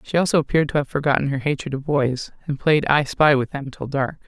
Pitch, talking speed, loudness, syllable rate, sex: 145 Hz, 255 wpm, -21 LUFS, 6.2 syllables/s, female